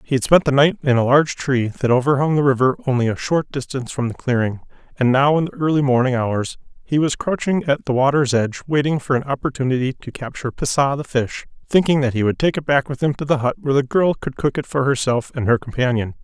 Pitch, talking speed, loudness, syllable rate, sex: 135 Hz, 245 wpm, -19 LUFS, 6.2 syllables/s, male